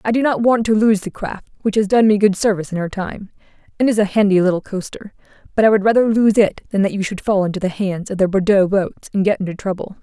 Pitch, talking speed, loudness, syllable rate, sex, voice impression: 200 Hz, 270 wpm, -17 LUFS, 6.3 syllables/s, female, very feminine, slightly young, slightly adult-like, very thin, tensed, slightly powerful, bright, soft, clear, fluent, very cute, intellectual, very refreshing, sincere, calm, very friendly, very reassuring, slightly unique, elegant, very sweet, lively, very kind